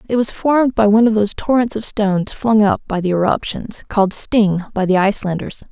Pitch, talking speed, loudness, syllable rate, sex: 210 Hz, 210 wpm, -16 LUFS, 5.8 syllables/s, female